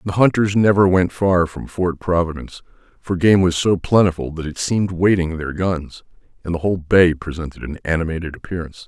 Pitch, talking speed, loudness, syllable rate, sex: 90 Hz, 185 wpm, -18 LUFS, 5.7 syllables/s, male